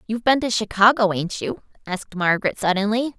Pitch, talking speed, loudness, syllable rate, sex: 215 Hz, 170 wpm, -20 LUFS, 6.1 syllables/s, female